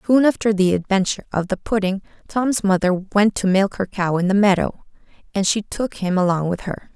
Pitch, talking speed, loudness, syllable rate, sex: 195 Hz, 205 wpm, -20 LUFS, 5.3 syllables/s, female